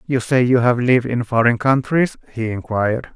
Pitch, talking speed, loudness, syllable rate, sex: 120 Hz, 190 wpm, -18 LUFS, 5.2 syllables/s, male